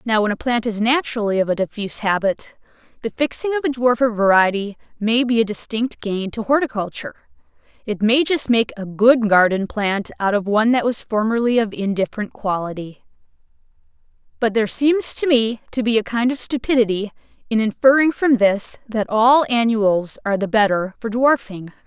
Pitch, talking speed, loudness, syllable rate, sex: 225 Hz, 170 wpm, -19 LUFS, 5.3 syllables/s, female